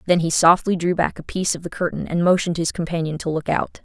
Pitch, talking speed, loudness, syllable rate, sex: 170 Hz, 265 wpm, -20 LUFS, 6.5 syllables/s, female